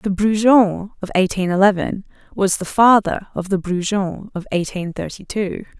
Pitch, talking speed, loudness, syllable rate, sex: 195 Hz, 155 wpm, -18 LUFS, 4.5 syllables/s, female